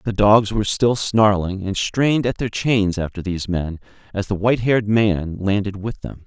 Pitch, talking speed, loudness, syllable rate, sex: 105 Hz, 200 wpm, -19 LUFS, 5.1 syllables/s, male